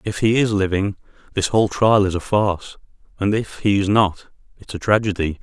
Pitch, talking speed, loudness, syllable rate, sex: 100 Hz, 200 wpm, -19 LUFS, 5.4 syllables/s, male